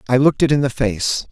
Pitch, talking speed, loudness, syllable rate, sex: 130 Hz, 275 wpm, -17 LUFS, 6.4 syllables/s, male